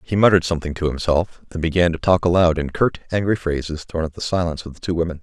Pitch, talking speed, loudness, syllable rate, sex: 85 Hz, 255 wpm, -20 LUFS, 7.0 syllables/s, male